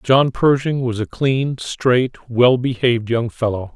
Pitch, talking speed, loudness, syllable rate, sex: 125 Hz, 160 wpm, -18 LUFS, 3.8 syllables/s, male